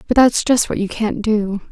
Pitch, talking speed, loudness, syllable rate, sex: 215 Hz, 245 wpm, -17 LUFS, 4.7 syllables/s, female